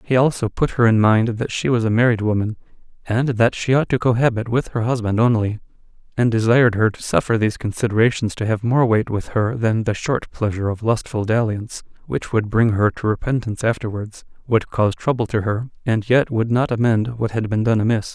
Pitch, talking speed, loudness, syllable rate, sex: 115 Hz, 210 wpm, -19 LUFS, 5.7 syllables/s, male